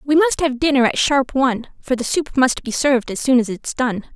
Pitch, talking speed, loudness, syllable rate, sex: 260 Hz, 260 wpm, -18 LUFS, 5.3 syllables/s, female